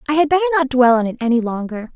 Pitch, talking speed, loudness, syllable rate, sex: 265 Hz, 275 wpm, -16 LUFS, 7.7 syllables/s, female